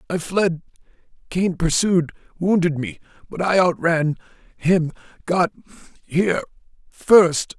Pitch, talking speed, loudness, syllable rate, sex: 170 Hz, 55 wpm, -20 LUFS, 3.6 syllables/s, male